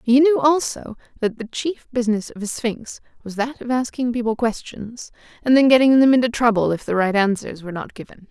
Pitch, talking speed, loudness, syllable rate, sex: 235 Hz, 210 wpm, -19 LUFS, 5.6 syllables/s, female